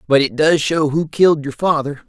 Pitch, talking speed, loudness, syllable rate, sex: 150 Hz, 230 wpm, -16 LUFS, 5.3 syllables/s, male